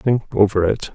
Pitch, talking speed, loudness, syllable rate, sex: 105 Hz, 190 wpm, -18 LUFS, 4.7 syllables/s, male